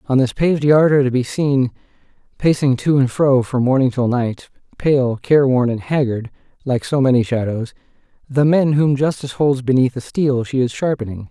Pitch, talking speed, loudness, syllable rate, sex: 130 Hz, 175 wpm, -17 LUFS, 5.3 syllables/s, male